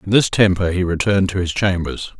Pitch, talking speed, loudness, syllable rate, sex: 95 Hz, 220 wpm, -18 LUFS, 5.8 syllables/s, male